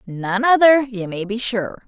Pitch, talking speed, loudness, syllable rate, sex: 225 Hz, 190 wpm, -18 LUFS, 4.0 syllables/s, female